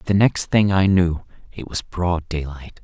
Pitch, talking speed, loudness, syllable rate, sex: 90 Hz, 190 wpm, -20 LUFS, 3.9 syllables/s, male